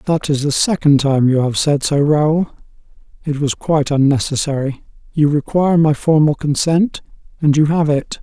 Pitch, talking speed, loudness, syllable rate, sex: 150 Hz, 170 wpm, -15 LUFS, 4.9 syllables/s, male